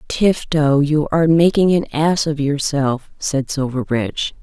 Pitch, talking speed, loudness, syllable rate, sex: 150 Hz, 135 wpm, -17 LUFS, 4.2 syllables/s, female